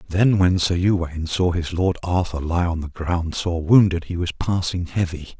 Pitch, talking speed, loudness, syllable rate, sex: 85 Hz, 200 wpm, -21 LUFS, 4.7 syllables/s, male